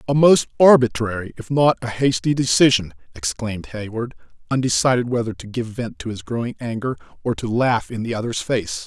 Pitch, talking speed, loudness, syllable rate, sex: 115 Hz, 175 wpm, -20 LUFS, 5.5 syllables/s, male